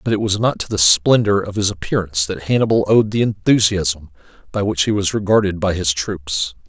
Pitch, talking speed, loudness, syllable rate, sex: 100 Hz, 205 wpm, -17 LUFS, 5.4 syllables/s, male